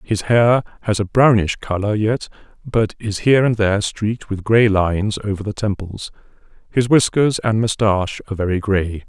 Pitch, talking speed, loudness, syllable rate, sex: 105 Hz, 170 wpm, -18 LUFS, 5.1 syllables/s, male